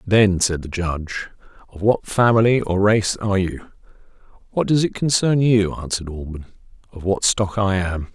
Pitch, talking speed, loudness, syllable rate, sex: 100 Hz, 160 wpm, -19 LUFS, 5.1 syllables/s, male